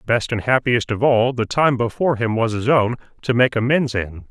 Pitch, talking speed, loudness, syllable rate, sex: 120 Hz, 225 wpm, -19 LUFS, 5.2 syllables/s, male